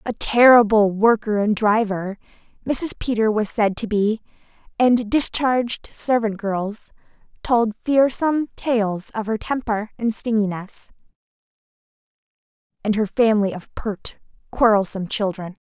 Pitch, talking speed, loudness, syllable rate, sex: 220 Hz, 115 wpm, -20 LUFS, 4.3 syllables/s, female